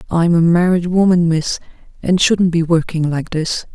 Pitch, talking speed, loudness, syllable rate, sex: 170 Hz, 175 wpm, -15 LUFS, 4.6 syllables/s, female